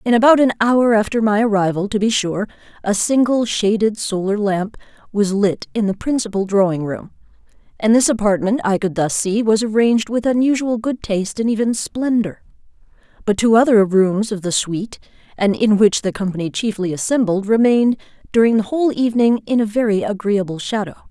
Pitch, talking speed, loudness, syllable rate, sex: 215 Hz, 175 wpm, -17 LUFS, 5.5 syllables/s, female